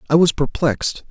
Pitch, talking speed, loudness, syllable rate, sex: 145 Hz, 165 wpm, -18 LUFS, 5.7 syllables/s, male